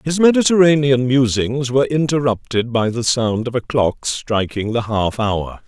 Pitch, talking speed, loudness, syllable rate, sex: 125 Hz, 160 wpm, -17 LUFS, 4.5 syllables/s, male